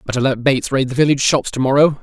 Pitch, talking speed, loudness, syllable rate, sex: 135 Hz, 265 wpm, -16 LUFS, 7.3 syllables/s, male